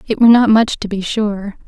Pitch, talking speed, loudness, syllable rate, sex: 215 Hz, 250 wpm, -14 LUFS, 5.5 syllables/s, female